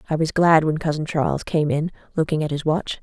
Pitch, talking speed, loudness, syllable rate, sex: 155 Hz, 240 wpm, -21 LUFS, 5.8 syllables/s, female